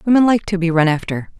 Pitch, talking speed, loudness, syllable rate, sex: 185 Hz, 260 wpm, -16 LUFS, 6.4 syllables/s, female